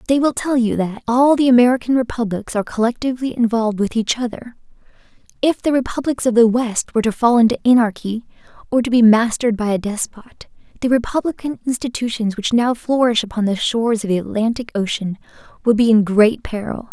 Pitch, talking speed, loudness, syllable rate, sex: 230 Hz, 180 wpm, -17 LUFS, 6.0 syllables/s, female